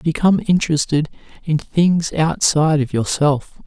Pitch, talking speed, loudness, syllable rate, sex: 155 Hz, 115 wpm, -17 LUFS, 4.6 syllables/s, male